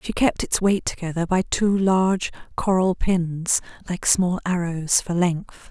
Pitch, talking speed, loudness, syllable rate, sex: 180 Hz, 160 wpm, -22 LUFS, 4.1 syllables/s, female